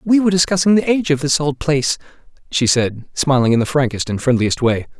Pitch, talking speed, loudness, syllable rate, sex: 145 Hz, 215 wpm, -16 LUFS, 6.2 syllables/s, male